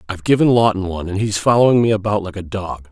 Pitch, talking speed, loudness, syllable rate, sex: 100 Hz, 245 wpm, -17 LUFS, 7.0 syllables/s, male